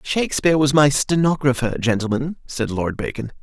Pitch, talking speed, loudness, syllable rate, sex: 140 Hz, 140 wpm, -19 LUFS, 5.5 syllables/s, male